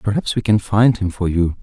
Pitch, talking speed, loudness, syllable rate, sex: 100 Hz, 260 wpm, -17 LUFS, 5.3 syllables/s, male